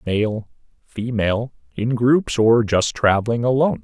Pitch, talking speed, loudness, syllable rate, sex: 115 Hz, 125 wpm, -19 LUFS, 4.5 syllables/s, male